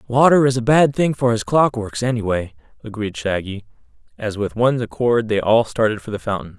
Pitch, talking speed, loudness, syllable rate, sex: 115 Hz, 190 wpm, -18 LUFS, 5.5 syllables/s, male